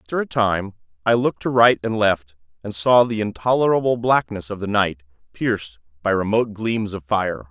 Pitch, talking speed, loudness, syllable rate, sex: 105 Hz, 185 wpm, -20 LUFS, 5.2 syllables/s, male